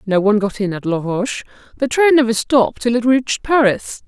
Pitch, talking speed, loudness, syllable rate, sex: 230 Hz, 205 wpm, -16 LUFS, 5.9 syllables/s, female